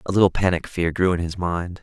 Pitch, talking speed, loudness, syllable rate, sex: 90 Hz, 265 wpm, -22 LUFS, 5.9 syllables/s, male